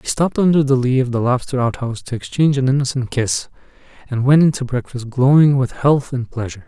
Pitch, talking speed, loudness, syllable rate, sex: 130 Hz, 215 wpm, -17 LUFS, 6.1 syllables/s, male